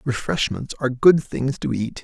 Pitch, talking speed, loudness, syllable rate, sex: 135 Hz, 175 wpm, -21 LUFS, 4.8 syllables/s, male